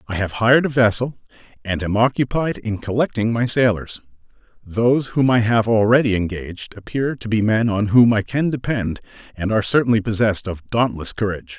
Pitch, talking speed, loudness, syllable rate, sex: 110 Hz, 175 wpm, -19 LUFS, 5.6 syllables/s, male